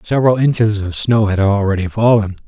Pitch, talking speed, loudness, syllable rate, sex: 105 Hz, 170 wpm, -15 LUFS, 5.7 syllables/s, male